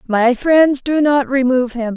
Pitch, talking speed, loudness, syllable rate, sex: 265 Hz, 185 wpm, -14 LUFS, 4.2 syllables/s, female